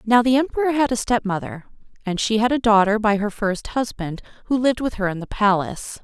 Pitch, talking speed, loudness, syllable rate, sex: 220 Hz, 220 wpm, -20 LUFS, 5.9 syllables/s, female